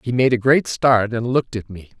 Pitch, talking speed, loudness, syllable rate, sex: 120 Hz, 270 wpm, -17 LUFS, 5.5 syllables/s, male